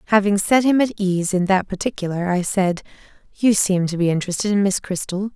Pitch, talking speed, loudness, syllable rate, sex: 195 Hz, 200 wpm, -19 LUFS, 5.7 syllables/s, female